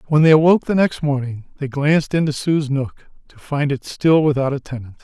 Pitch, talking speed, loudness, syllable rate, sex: 145 Hz, 215 wpm, -18 LUFS, 5.6 syllables/s, male